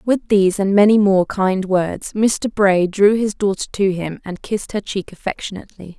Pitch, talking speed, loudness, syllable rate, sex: 200 Hz, 190 wpm, -17 LUFS, 4.9 syllables/s, female